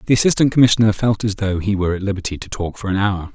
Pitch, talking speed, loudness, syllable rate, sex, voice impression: 105 Hz, 270 wpm, -18 LUFS, 7.0 syllables/s, male, masculine, adult-like, slightly thick, tensed, slightly dark, soft, fluent, cool, calm, slightly mature, friendly, reassuring, wild, kind, modest